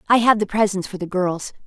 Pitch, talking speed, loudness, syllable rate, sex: 195 Hz, 250 wpm, -20 LUFS, 5.8 syllables/s, female